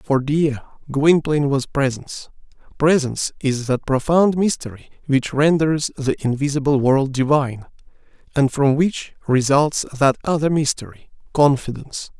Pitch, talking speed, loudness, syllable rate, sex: 140 Hz, 115 wpm, -19 LUFS, 4.8 syllables/s, male